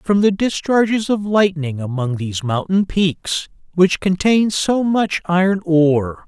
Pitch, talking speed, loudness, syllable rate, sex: 180 Hz, 145 wpm, -17 LUFS, 4.1 syllables/s, male